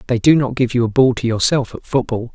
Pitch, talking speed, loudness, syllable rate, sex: 125 Hz, 280 wpm, -16 LUFS, 6.0 syllables/s, male